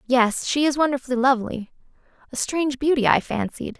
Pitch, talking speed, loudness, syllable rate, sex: 265 Hz, 140 wpm, -22 LUFS, 5.9 syllables/s, female